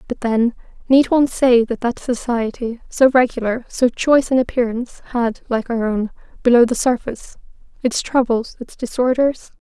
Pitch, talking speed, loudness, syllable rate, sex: 240 Hz, 155 wpm, -18 LUFS, 5.0 syllables/s, female